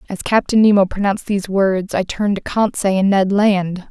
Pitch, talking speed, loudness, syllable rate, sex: 195 Hz, 200 wpm, -16 LUFS, 5.4 syllables/s, female